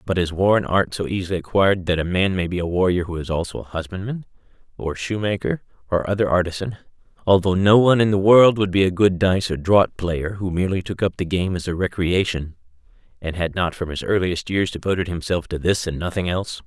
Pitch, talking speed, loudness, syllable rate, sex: 90 Hz, 225 wpm, -20 LUFS, 5.9 syllables/s, male